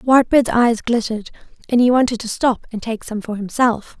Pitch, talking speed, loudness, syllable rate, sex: 230 Hz, 195 wpm, -18 LUFS, 5.4 syllables/s, female